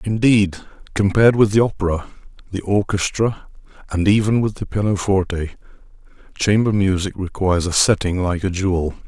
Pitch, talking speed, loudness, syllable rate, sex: 100 Hz, 130 wpm, -18 LUFS, 5.4 syllables/s, male